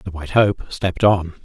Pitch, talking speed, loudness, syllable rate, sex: 90 Hz, 210 wpm, -18 LUFS, 4.4 syllables/s, male